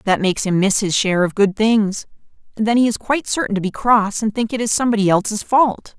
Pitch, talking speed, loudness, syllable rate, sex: 215 Hz, 250 wpm, -17 LUFS, 6.0 syllables/s, female